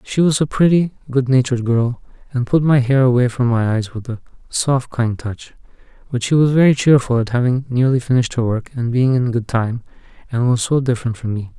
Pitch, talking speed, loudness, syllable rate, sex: 125 Hz, 210 wpm, -17 LUFS, 5.6 syllables/s, male